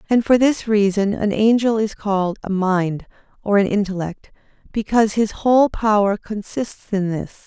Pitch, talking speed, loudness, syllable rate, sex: 210 Hz, 160 wpm, -19 LUFS, 4.8 syllables/s, female